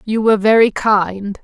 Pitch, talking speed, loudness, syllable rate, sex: 210 Hz, 170 wpm, -14 LUFS, 4.5 syllables/s, female